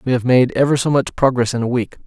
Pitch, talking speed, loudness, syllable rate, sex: 125 Hz, 290 wpm, -16 LUFS, 6.7 syllables/s, male